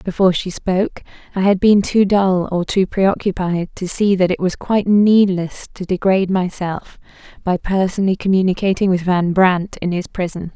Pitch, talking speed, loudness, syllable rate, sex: 185 Hz, 170 wpm, -17 LUFS, 5.0 syllables/s, female